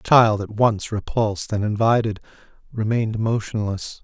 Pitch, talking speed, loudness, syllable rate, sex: 110 Hz, 135 wpm, -21 LUFS, 4.9 syllables/s, male